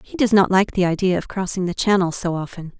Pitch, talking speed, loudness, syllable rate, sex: 185 Hz, 260 wpm, -19 LUFS, 6.0 syllables/s, female